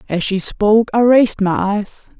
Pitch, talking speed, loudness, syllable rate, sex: 210 Hz, 190 wpm, -15 LUFS, 4.7 syllables/s, female